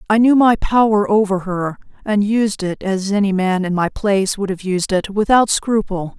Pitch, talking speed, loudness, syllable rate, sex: 200 Hz, 205 wpm, -17 LUFS, 3.1 syllables/s, female